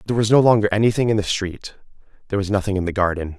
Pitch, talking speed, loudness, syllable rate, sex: 100 Hz, 250 wpm, -19 LUFS, 7.8 syllables/s, male